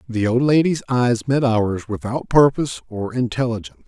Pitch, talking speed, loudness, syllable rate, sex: 120 Hz, 155 wpm, -19 LUFS, 5.1 syllables/s, male